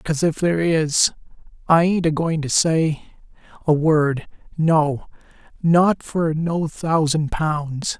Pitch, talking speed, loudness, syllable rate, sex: 160 Hz, 130 wpm, -19 LUFS, 3.6 syllables/s, male